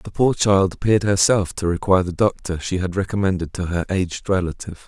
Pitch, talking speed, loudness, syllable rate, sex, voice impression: 95 Hz, 195 wpm, -20 LUFS, 6.1 syllables/s, male, masculine, adult-like, thick, slightly powerful, slightly halting, slightly raspy, cool, sincere, slightly mature, reassuring, wild, lively, kind